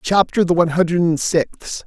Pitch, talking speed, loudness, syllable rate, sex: 170 Hz, 195 wpm, -17 LUFS, 5.1 syllables/s, male